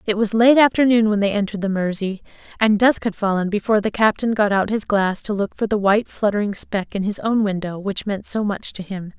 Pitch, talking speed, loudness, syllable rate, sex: 205 Hz, 240 wpm, -19 LUFS, 5.8 syllables/s, female